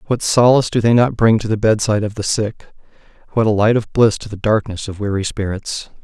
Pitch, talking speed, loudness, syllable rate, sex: 110 Hz, 230 wpm, -16 LUFS, 5.9 syllables/s, male